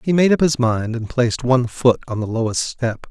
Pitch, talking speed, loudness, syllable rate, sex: 125 Hz, 250 wpm, -19 LUFS, 5.6 syllables/s, male